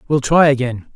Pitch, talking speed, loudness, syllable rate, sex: 135 Hz, 190 wpm, -15 LUFS, 5.1 syllables/s, male